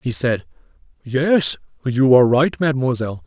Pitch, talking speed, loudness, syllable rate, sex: 125 Hz, 130 wpm, -18 LUFS, 5.1 syllables/s, male